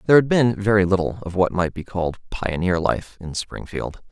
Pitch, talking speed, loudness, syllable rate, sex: 95 Hz, 205 wpm, -22 LUFS, 5.4 syllables/s, male